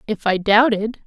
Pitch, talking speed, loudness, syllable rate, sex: 215 Hz, 170 wpm, -17 LUFS, 4.7 syllables/s, female